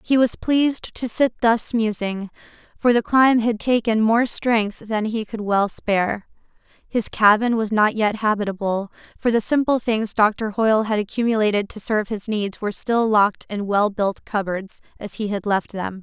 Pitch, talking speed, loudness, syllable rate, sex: 215 Hz, 185 wpm, -20 LUFS, 4.7 syllables/s, female